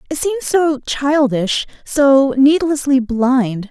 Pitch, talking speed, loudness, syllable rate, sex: 270 Hz, 115 wpm, -15 LUFS, 3.1 syllables/s, female